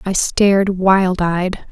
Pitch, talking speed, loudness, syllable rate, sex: 185 Hz, 140 wpm, -15 LUFS, 3.2 syllables/s, female